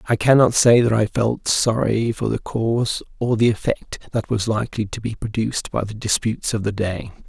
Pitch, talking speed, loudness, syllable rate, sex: 110 Hz, 205 wpm, -20 LUFS, 5.3 syllables/s, male